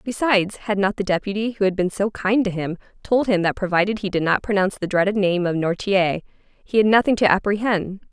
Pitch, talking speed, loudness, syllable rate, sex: 200 Hz, 220 wpm, -20 LUFS, 5.7 syllables/s, female